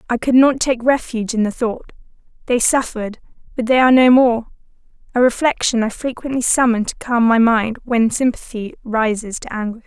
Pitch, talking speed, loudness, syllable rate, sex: 235 Hz, 175 wpm, -17 LUFS, 5.5 syllables/s, female